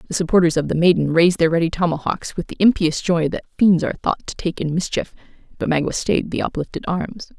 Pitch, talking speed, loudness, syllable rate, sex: 170 Hz, 220 wpm, -19 LUFS, 6.3 syllables/s, female